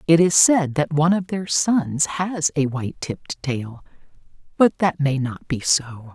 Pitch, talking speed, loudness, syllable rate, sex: 155 Hz, 185 wpm, -20 LUFS, 4.2 syllables/s, female